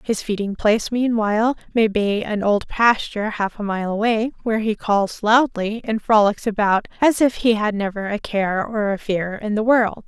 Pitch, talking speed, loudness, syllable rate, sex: 215 Hz, 195 wpm, -20 LUFS, 4.7 syllables/s, female